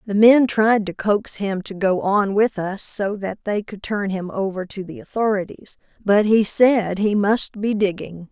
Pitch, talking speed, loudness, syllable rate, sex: 200 Hz, 200 wpm, -20 LUFS, 4.2 syllables/s, female